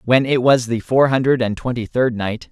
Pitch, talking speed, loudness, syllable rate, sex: 125 Hz, 240 wpm, -17 LUFS, 5.0 syllables/s, male